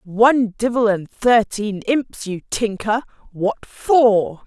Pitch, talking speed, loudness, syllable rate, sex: 220 Hz, 120 wpm, -18 LUFS, 3.3 syllables/s, female